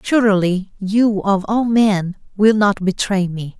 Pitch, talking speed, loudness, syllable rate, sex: 200 Hz, 150 wpm, -17 LUFS, 3.8 syllables/s, female